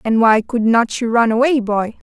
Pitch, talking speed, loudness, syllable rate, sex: 230 Hz, 225 wpm, -15 LUFS, 4.8 syllables/s, female